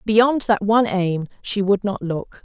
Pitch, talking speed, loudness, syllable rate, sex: 205 Hz, 195 wpm, -20 LUFS, 4.2 syllables/s, female